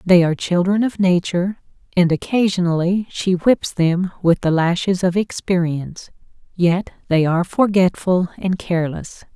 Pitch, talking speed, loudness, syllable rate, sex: 180 Hz, 135 wpm, -18 LUFS, 4.8 syllables/s, female